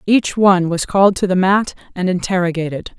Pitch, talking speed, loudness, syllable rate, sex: 185 Hz, 180 wpm, -16 LUFS, 5.7 syllables/s, female